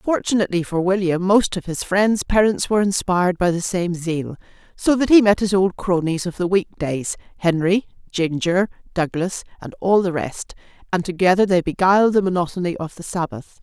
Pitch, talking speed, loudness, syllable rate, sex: 185 Hz, 170 wpm, -19 LUFS, 5.2 syllables/s, female